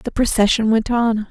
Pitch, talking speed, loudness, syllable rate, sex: 225 Hz, 185 wpm, -17 LUFS, 4.7 syllables/s, female